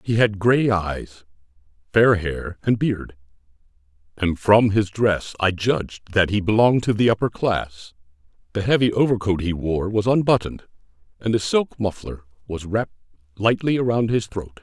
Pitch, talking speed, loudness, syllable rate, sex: 100 Hz, 155 wpm, -21 LUFS, 4.8 syllables/s, male